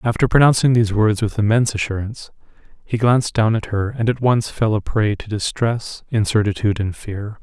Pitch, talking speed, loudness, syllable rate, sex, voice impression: 110 Hz, 185 wpm, -18 LUFS, 5.7 syllables/s, male, very masculine, middle-aged, very thick, relaxed, weak, very dark, very soft, muffled, fluent, slightly raspy, cool, very intellectual, slightly refreshing, very sincere, very calm, mature, very friendly, very reassuring, very unique, very elegant, slightly wild, very sweet, lively, very kind, very modest